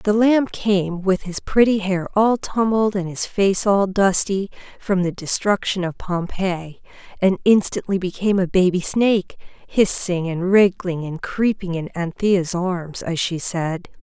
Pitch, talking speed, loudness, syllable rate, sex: 190 Hz, 155 wpm, -20 LUFS, 4.1 syllables/s, female